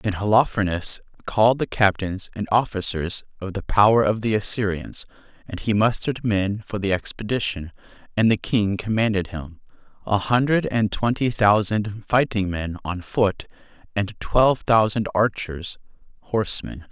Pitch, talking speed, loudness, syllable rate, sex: 105 Hz, 140 wpm, -22 LUFS, 4.7 syllables/s, male